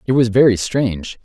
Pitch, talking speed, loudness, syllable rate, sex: 115 Hz, 195 wpm, -16 LUFS, 5.5 syllables/s, male